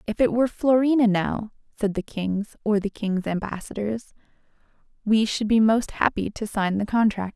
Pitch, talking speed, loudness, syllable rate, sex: 215 Hz, 170 wpm, -23 LUFS, 4.9 syllables/s, female